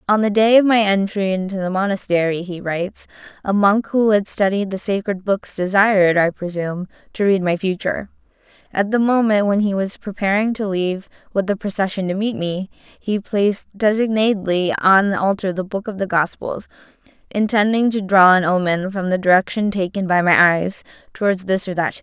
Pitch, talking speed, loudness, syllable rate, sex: 195 Hz, 190 wpm, -18 LUFS, 5.4 syllables/s, female